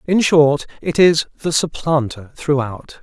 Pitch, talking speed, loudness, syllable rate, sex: 150 Hz, 140 wpm, -17 LUFS, 4.0 syllables/s, male